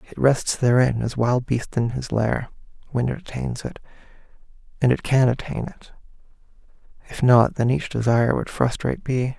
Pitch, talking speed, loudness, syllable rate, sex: 125 Hz, 165 wpm, -22 LUFS, 5.0 syllables/s, male